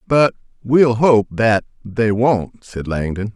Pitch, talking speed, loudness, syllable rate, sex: 115 Hz, 145 wpm, -17 LUFS, 3.4 syllables/s, male